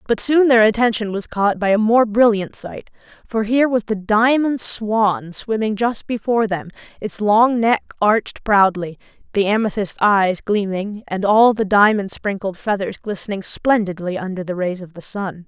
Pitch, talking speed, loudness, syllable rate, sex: 210 Hz, 170 wpm, -18 LUFS, 4.6 syllables/s, female